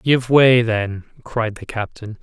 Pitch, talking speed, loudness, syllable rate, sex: 115 Hz, 160 wpm, -18 LUFS, 3.5 syllables/s, male